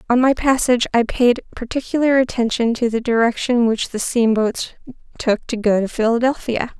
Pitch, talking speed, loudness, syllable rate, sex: 235 Hz, 160 wpm, -18 LUFS, 5.2 syllables/s, female